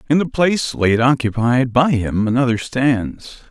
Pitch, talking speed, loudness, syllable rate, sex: 125 Hz, 155 wpm, -17 LUFS, 4.4 syllables/s, male